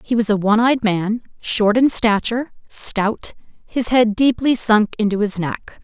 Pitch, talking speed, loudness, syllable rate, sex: 220 Hz, 175 wpm, -17 LUFS, 4.4 syllables/s, female